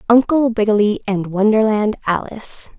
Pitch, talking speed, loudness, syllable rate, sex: 215 Hz, 110 wpm, -17 LUFS, 5.0 syllables/s, female